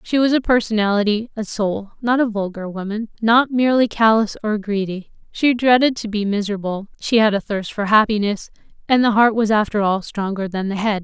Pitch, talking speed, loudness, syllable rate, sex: 215 Hz, 185 wpm, -18 LUFS, 5.4 syllables/s, female